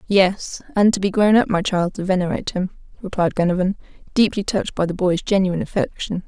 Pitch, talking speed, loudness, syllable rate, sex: 190 Hz, 190 wpm, -20 LUFS, 6.0 syllables/s, female